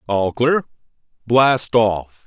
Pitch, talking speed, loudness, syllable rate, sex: 115 Hz, 105 wpm, -17 LUFS, 2.7 syllables/s, male